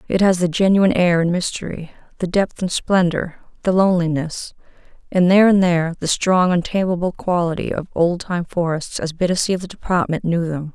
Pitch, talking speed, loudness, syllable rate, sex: 175 Hz, 180 wpm, -18 LUFS, 5.6 syllables/s, female